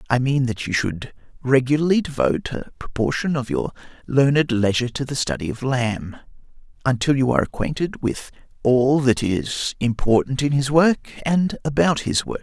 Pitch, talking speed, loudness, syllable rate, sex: 135 Hz, 165 wpm, -21 LUFS, 4.9 syllables/s, male